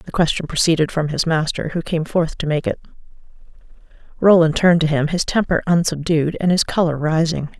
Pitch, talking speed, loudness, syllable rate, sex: 160 Hz, 180 wpm, -18 LUFS, 5.6 syllables/s, female